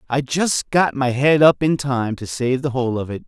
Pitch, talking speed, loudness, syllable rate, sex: 135 Hz, 255 wpm, -18 LUFS, 4.9 syllables/s, male